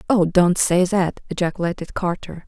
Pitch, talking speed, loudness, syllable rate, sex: 180 Hz, 145 wpm, -20 LUFS, 5.0 syllables/s, female